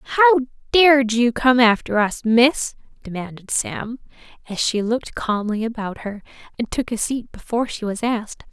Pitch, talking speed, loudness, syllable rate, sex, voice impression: 235 Hz, 160 wpm, -19 LUFS, 5.7 syllables/s, female, feminine, adult-like, tensed, powerful, bright, slightly soft, clear, fluent, cute, intellectual, friendly, elegant, slightly sweet, lively, slightly sharp